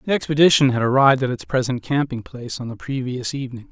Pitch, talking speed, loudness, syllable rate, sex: 130 Hz, 210 wpm, -20 LUFS, 6.7 syllables/s, male